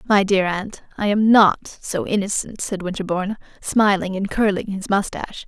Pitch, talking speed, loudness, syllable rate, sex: 200 Hz, 165 wpm, -20 LUFS, 4.8 syllables/s, female